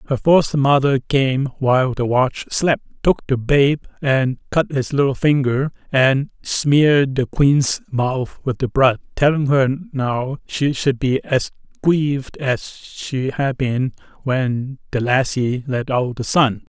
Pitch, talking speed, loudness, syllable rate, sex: 135 Hz, 155 wpm, -18 LUFS, 3.8 syllables/s, male